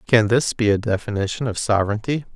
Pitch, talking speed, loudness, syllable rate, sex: 110 Hz, 180 wpm, -20 LUFS, 6.1 syllables/s, male